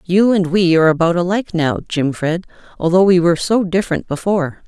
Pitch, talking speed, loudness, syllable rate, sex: 175 Hz, 180 wpm, -16 LUFS, 6.0 syllables/s, female